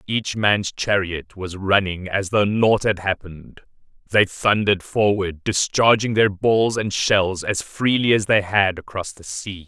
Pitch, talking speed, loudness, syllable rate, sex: 100 Hz, 160 wpm, -20 LUFS, 4.1 syllables/s, male